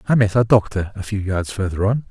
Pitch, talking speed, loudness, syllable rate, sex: 105 Hz, 255 wpm, -19 LUFS, 5.9 syllables/s, male